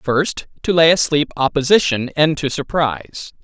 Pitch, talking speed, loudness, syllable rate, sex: 150 Hz, 140 wpm, -17 LUFS, 4.4 syllables/s, male